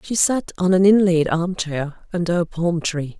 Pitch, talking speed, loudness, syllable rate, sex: 175 Hz, 190 wpm, -19 LUFS, 4.5 syllables/s, female